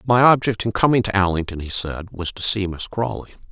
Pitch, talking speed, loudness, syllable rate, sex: 105 Hz, 220 wpm, -20 LUFS, 5.7 syllables/s, male